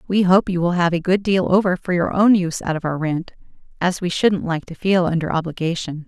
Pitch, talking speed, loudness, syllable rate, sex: 175 Hz, 245 wpm, -19 LUFS, 5.7 syllables/s, female